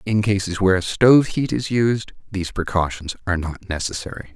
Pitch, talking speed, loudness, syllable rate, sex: 95 Hz, 165 wpm, -20 LUFS, 5.6 syllables/s, male